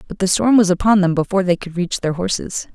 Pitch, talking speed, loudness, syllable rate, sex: 185 Hz, 260 wpm, -17 LUFS, 6.3 syllables/s, female